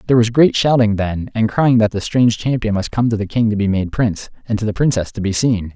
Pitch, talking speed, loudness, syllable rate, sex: 110 Hz, 280 wpm, -16 LUFS, 6.2 syllables/s, male